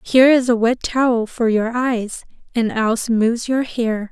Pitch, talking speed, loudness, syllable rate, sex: 235 Hz, 190 wpm, -18 LUFS, 4.1 syllables/s, female